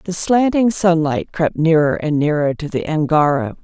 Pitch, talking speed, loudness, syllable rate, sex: 160 Hz, 165 wpm, -16 LUFS, 4.5 syllables/s, female